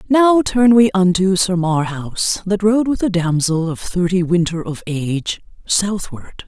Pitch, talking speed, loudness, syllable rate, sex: 185 Hz, 160 wpm, -16 LUFS, 4.2 syllables/s, female